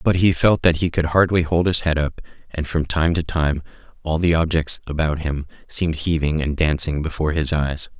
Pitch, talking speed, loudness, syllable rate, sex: 80 Hz, 210 wpm, -20 LUFS, 5.2 syllables/s, male